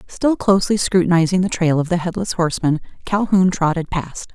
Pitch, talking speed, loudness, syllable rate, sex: 180 Hz, 165 wpm, -18 LUFS, 5.6 syllables/s, female